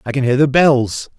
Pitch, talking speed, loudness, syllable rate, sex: 135 Hz, 255 wpm, -14 LUFS, 4.9 syllables/s, male